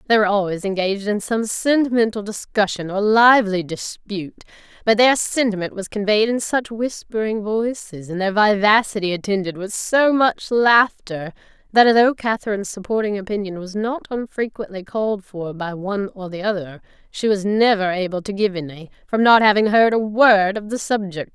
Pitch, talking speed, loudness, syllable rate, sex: 205 Hz, 165 wpm, -19 LUFS, 5.1 syllables/s, female